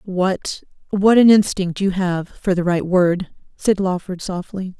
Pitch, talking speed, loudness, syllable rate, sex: 185 Hz, 150 wpm, -18 LUFS, 3.9 syllables/s, female